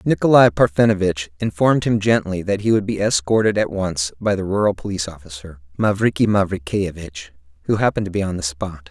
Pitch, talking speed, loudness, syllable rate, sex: 95 Hz, 175 wpm, -19 LUFS, 5.9 syllables/s, male